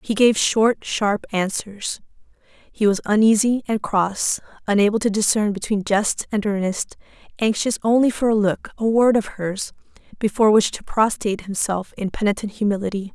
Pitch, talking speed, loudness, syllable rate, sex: 210 Hz, 155 wpm, -20 LUFS, 4.9 syllables/s, female